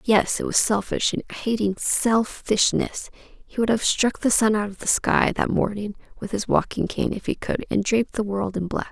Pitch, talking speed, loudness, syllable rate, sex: 210 Hz, 200 wpm, -22 LUFS, 4.7 syllables/s, female